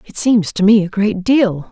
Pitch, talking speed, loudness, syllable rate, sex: 205 Hz, 245 wpm, -14 LUFS, 4.5 syllables/s, female